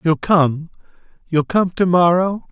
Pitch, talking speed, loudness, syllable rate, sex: 170 Hz, 145 wpm, -16 LUFS, 3.9 syllables/s, male